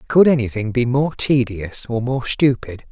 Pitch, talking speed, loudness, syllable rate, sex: 125 Hz, 165 wpm, -18 LUFS, 4.4 syllables/s, male